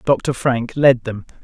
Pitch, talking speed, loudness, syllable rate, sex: 125 Hz, 170 wpm, -17 LUFS, 3.4 syllables/s, male